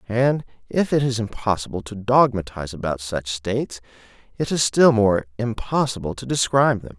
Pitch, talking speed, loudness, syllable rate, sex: 115 Hz, 155 wpm, -21 LUFS, 5.2 syllables/s, male